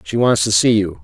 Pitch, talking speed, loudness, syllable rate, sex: 110 Hz, 290 wpm, -15 LUFS, 5.4 syllables/s, male